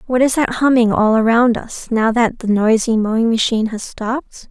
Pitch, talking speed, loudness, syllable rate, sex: 230 Hz, 200 wpm, -16 LUFS, 4.9 syllables/s, female